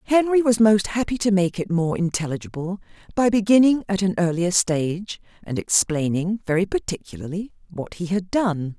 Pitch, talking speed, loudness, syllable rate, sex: 190 Hz, 155 wpm, -21 LUFS, 5.1 syllables/s, female